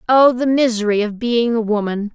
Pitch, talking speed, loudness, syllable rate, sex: 230 Hz, 195 wpm, -17 LUFS, 5.1 syllables/s, female